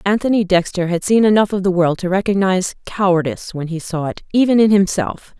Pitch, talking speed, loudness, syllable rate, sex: 190 Hz, 200 wpm, -16 LUFS, 6.0 syllables/s, female